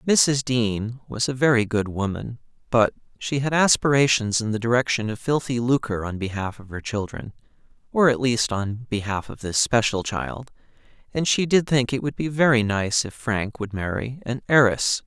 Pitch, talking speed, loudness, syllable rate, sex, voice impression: 120 Hz, 185 wpm, -22 LUFS, 4.8 syllables/s, male, masculine, adult-like, slightly soft, slightly clear, slightly intellectual, refreshing, kind